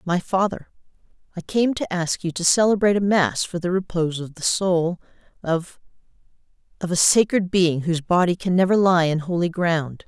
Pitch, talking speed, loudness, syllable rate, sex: 175 Hz, 165 wpm, -21 LUFS, 5.2 syllables/s, female